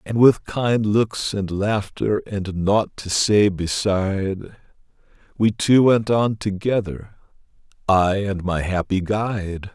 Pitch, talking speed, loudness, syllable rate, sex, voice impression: 100 Hz, 130 wpm, -20 LUFS, 3.5 syllables/s, male, very masculine, very adult-like, old, very thick, slightly tensed, weak, dark, soft, slightly muffled, slightly fluent, slightly raspy, very cool, very intellectual, very sincere, very calm, very mature, very friendly, very reassuring, unique, very elegant, slightly wild, very sweet, slightly lively, very kind, slightly modest